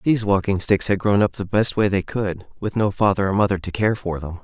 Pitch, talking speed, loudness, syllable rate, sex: 100 Hz, 270 wpm, -20 LUFS, 5.7 syllables/s, male